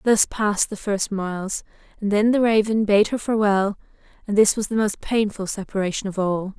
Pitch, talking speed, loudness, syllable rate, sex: 205 Hz, 190 wpm, -21 LUFS, 5.4 syllables/s, female